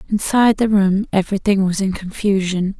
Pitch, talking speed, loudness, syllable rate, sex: 195 Hz, 150 wpm, -17 LUFS, 5.6 syllables/s, female